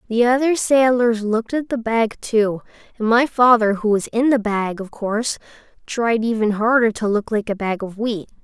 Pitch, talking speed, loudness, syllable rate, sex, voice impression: 225 Hz, 200 wpm, -19 LUFS, 4.9 syllables/s, female, gender-neutral, young, tensed, slightly powerful, slightly bright, clear, slightly halting, cute, friendly, slightly sweet, lively